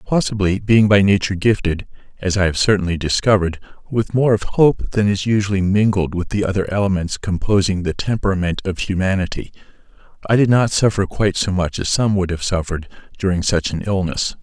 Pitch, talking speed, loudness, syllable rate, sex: 95 Hz, 180 wpm, -18 LUFS, 5.8 syllables/s, male